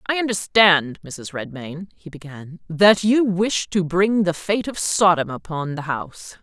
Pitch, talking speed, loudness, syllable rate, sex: 180 Hz, 170 wpm, -19 LUFS, 4.1 syllables/s, female